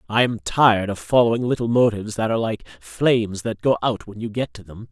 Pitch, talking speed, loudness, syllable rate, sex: 110 Hz, 230 wpm, -21 LUFS, 6.1 syllables/s, male